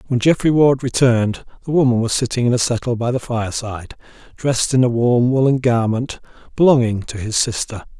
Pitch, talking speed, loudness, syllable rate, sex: 125 Hz, 180 wpm, -17 LUFS, 5.8 syllables/s, male